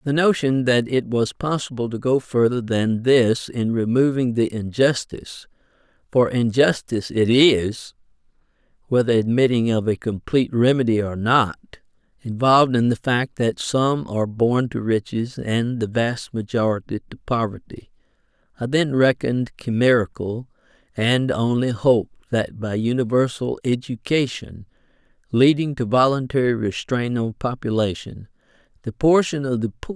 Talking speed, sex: 135 wpm, male